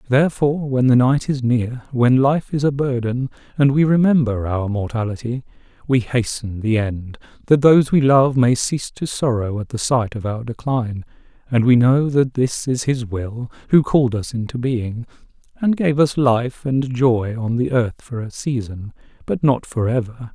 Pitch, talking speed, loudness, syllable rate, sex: 125 Hz, 185 wpm, -19 LUFS, 4.7 syllables/s, male